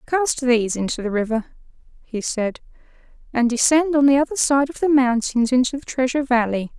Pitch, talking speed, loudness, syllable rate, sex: 255 Hz, 175 wpm, -19 LUFS, 5.5 syllables/s, female